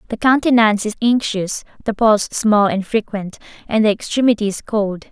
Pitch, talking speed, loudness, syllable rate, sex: 215 Hz, 150 wpm, -17 LUFS, 5.2 syllables/s, female